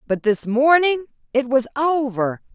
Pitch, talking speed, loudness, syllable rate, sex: 265 Hz, 140 wpm, -19 LUFS, 4.3 syllables/s, female